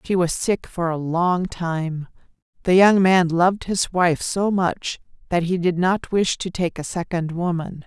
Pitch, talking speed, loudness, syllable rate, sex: 175 Hz, 190 wpm, -21 LUFS, 4.1 syllables/s, female